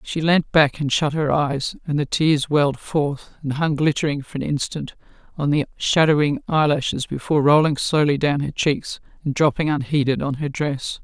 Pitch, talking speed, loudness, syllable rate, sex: 145 Hz, 190 wpm, -20 LUFS, 4.9 syllables/s, female